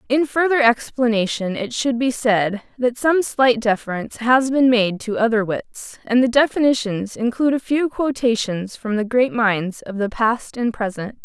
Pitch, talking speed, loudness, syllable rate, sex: 235 Hz, 175 wpm, -19 LUFS, 4.5 syllables/s, female